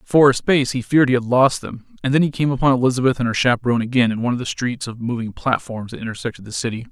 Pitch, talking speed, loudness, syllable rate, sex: 125 Hz, 270 wpm, -19 LUFS, 7.2 syllables/s, male